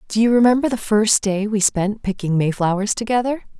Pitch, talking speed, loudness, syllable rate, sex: 215 Hz, 185 wpm, -18 LUFS, 5.5 syllables/s, female